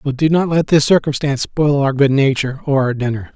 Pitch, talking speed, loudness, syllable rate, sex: 140 Hz, 230 wpm, -15 LUFS, 5.9 syllables/s, male